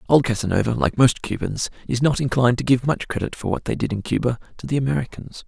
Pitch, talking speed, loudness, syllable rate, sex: 125 Hz, 230 wpm, -21 LUFS, 6.5 syllables/s, male